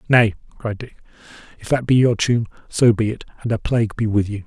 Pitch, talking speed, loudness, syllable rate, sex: 110 Hz, 230 wpm, -19 LUFS, 6.0 syllables/s, male